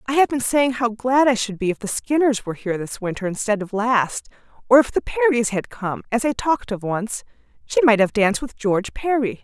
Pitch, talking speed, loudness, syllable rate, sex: 230 Hz, 235 wpm, -20 LUFS, 5.7 syllables/s, female